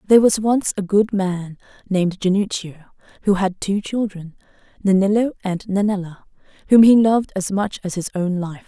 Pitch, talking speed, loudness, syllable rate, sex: 195 Hz, 165 wpm, -19 LUFS, 5.1 syllables/s, female